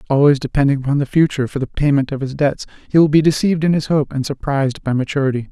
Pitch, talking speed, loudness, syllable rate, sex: 140 Hz, 240 wpm, -17 LUFS, 7.1 syllables/s, male